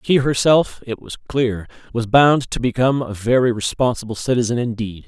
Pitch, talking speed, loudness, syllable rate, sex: 120 Hz, 165 wpm, -18 LUFS, 5.3 syllables/s, male